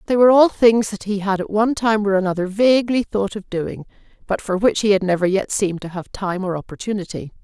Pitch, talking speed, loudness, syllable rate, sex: 200 Hz, 235 wpm, -19 LUFS, 6.1 syllables/s, female